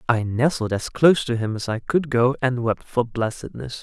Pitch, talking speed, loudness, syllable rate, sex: 120 Hz, 220 wpm, -22 LUFS, 5.0 syllables/s, male